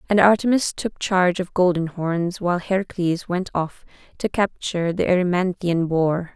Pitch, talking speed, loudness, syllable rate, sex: 180 Hz, 150 wpm, -21 LUFS, 4.9 syllables/s, female